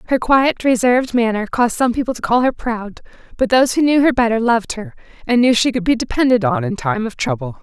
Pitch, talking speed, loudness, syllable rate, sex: 245 Hz, 235 wpm, -16 LUFS, 6.1 syllables/s, female